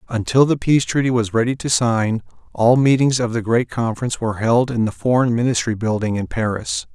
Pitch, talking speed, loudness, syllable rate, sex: 120 Hz, 200 wpm, -18 LUFS, 5.8 syllables/s, male